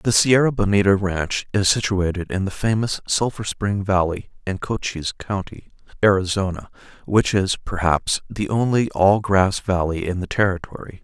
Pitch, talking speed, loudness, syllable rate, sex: 95 Hz, 145 wpm, -20 LUFS, 4.7 syllables/s, male